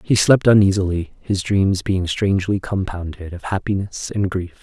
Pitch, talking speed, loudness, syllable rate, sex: 95 Hz, 155 wpm, -19 LUFS, 4.7 syllables/s, male